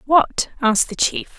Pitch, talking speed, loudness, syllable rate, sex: 260 Hz, 175 wpm, -18 LUFS, 4.7 syllables/s, female